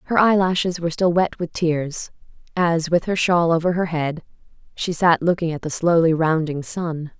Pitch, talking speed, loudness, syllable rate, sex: 170 Hz, 185 wpm, -20 LUFS, 4.8 syllables/s, female